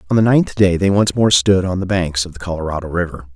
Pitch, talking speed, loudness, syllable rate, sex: 90 Hz, 270 wpm, -16 LUFS, 6.2 syllables/s, male